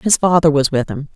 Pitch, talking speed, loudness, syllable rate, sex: 155 Hz, 260 wpm, -14 LUFS, 5.6 syllables/s, female